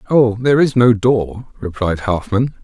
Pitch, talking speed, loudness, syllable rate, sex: 115 Hz, 160 wpm, -15 LUFS, 4.5 syllables/s, male